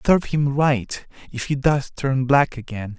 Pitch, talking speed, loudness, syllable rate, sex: 135 Hz, 180 wpm, -21 LUFS, 4.2 syllables/s, male